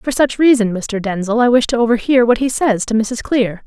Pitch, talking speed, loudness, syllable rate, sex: 230 Hz, 245 wpm, -15 LUFS, 5.2 syllables/s, female